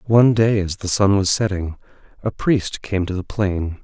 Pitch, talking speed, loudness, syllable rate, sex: 100 Hz, 205 wpm, -19 LUFS, 4.7 syllables/s, male